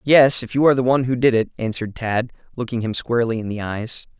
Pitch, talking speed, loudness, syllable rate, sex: 120 Hz, 245 wpm, -20 LUFS, 6.6 syllables/s, male